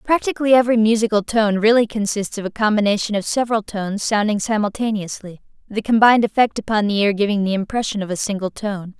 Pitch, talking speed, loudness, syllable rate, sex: 210 Hz, 180 wpm, -18 LUFS, 6.4 syllables/s, female